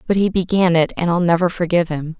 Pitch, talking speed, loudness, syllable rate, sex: 175 Hz, 245 wpm, -17 LUFS, 6.3 syllables/s, female